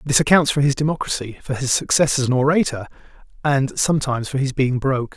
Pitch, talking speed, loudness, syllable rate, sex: 135 Hz, 185 wpm, -19 LUFS, 6.3 syllables/s, male